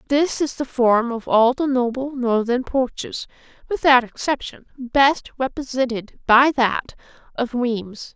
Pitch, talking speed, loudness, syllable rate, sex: 250 Hz, 135 wpm, -20 LUFS, 4.0 syllables/s, female